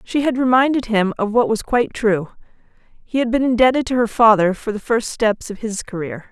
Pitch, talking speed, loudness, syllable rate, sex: 225 Hz, 220 wpm, -18 LUFS, 5.5 syllables/s, female